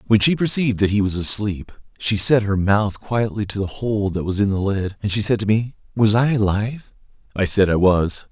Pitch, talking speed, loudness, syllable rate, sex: 105 Hz, 230 wpm, -19 LUFS, 5.2 syllables/s, male